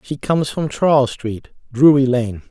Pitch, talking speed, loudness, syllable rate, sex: 135 Hz, 170 wpm, -17 LUFS, 4.6 syllables/s, male